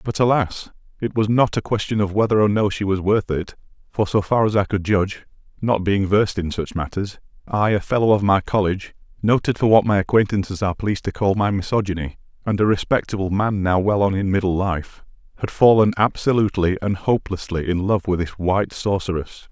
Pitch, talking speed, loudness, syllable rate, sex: 100 Hz, 205 wpm, -20 LUFS, 5.8 syllables/s, male